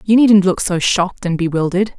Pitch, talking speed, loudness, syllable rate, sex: 190 Hz, 210 wpm, -15 LUFS, 6.0 syllables/s, female